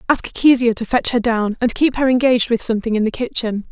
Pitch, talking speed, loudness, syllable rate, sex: 235 Hz, 245 wpm, -17 LUFS, 6.1 syllables/s, female